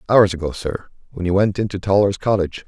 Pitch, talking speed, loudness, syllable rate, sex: 95 Hz, 180 wpm, -19 LUFS, 6.3 syllables/s, male